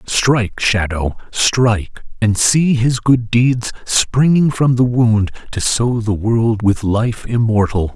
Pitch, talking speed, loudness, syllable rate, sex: 115 Hz, 145 wpm, -15 LUFS, 3.5 syllables/s, male